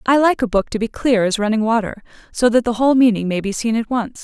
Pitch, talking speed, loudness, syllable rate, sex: 230 Hz, 285 wpm, -17 LUFS, 6.3 syllables/s, female